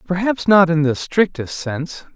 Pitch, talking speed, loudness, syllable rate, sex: 170 Hz, 165 wpm, -17 LUFS, 4.7 syllables/s, male